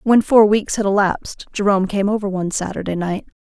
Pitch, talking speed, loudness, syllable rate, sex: 200 Hz, 195 wpm, -18 LUFS, 6.0 syllables/s, female